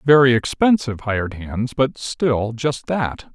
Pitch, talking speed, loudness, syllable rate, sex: 125 Hz, 145 wpm, -20 LUFS, 4.1 syllables/s, male